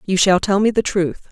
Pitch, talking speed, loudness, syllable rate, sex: 190 Hz, 275 wpm, -17 LUFS, 5.5 syllables/s, female